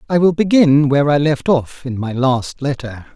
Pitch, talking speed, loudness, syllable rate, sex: 140 Hz, 210 wpm, -15 LUFS, 4.8 syllables/s, male